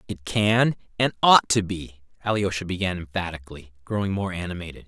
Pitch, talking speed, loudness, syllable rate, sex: 95 Hz, 150 wpm, -23 LUFS, 5.7 syllables/s, male